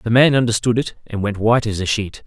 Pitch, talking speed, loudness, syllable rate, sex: 110 Hz, 265 wpm, -18 LUFS, 6.1 syllables/s, male